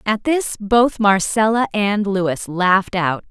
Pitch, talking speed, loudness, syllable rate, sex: 205 Hz, 145 wpm, -17 LUFS, 3.6 syllables/s, female